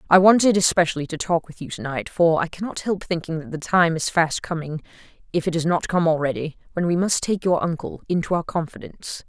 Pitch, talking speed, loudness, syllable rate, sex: 170 Hz, 215 wpm, -22 LUFS, 5.9 syllables/s, female